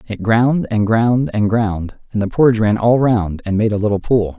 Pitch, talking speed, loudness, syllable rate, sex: 110 Hz, 235 wpm, -16 LUFS, 4.9 syllables/s, male